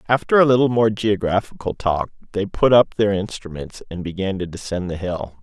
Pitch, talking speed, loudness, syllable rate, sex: 100 Hz, 190 wpm, -20 LUFS, 5.3 syllables/s, male